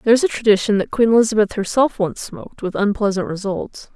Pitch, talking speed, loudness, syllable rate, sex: 210 Hz, 180 wpm, -18 LUFS, 6.3 syllables/s, female